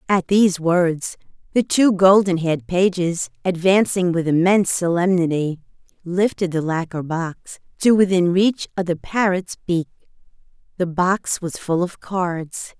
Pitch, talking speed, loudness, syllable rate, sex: 180 Hz, 135 wpm, -19 LUFS, 4.3 syllables/s, female